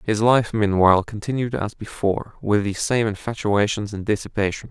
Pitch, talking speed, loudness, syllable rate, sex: 105 Hz, 155 wpm, -21 LUFS, 5.3 syllables/s, male